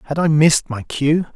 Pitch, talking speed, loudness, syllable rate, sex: 150 Hz, 220 wpm, -17 LUFS, 5.5 syllables/s, male